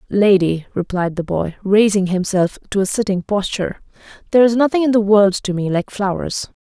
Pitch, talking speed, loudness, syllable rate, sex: 200 Hz, 180 wpm, -17 LUFS, 5.4 syllables/s, female